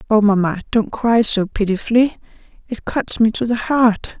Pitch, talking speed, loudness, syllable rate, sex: 220 Hz, 155 wpm, -17 LUFS, 4.8 syllables/s, female